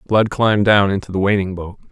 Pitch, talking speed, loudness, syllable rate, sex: 100 Hz, 220 wpm, -16 LUFS, 6.2 syllables/s, male